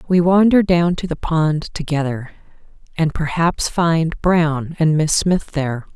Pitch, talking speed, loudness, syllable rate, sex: 160 Hz, 150 wpm, -17 LUFS, 4.0 syllables/s, female